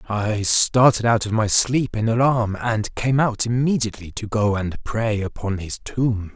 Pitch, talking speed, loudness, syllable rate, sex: 110 Hz, 180 wpm, -20 LUFS, 4.2 syllables/s, male